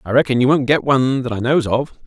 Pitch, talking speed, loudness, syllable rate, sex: 130 Hz, 290 wpm, -17 LUFS, 6.5 syllables/s, male